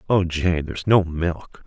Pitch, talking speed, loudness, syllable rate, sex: 85 Hz, 180 wpm, -21 LUFS, 4.1 syllables/s, male